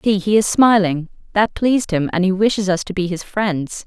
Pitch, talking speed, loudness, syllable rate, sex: 195 Hz, 235 wpm, -17 LUFS, 5.1 syllables/s, female